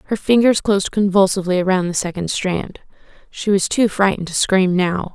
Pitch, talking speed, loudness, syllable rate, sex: 190 Hz, 175 wpm, -17 LUFS, 5.6 syllables/s, female